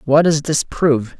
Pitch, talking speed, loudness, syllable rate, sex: 145 Hz, 200 wpm, -16 LUFS, 4.7 syllables/s, male